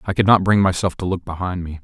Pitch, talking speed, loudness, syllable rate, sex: 90 Hz, 295 wpm, -18 LUFS, 6.4 syllables/s, male